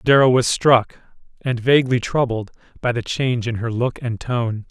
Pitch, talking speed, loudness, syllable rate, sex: 120 Hz, 180 wpm, -19 LUFS, 4.9 syllables/s, male